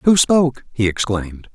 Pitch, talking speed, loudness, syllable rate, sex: 125 Hz, 155 wpm, -17 LUFS, 5.2 syllables/s, male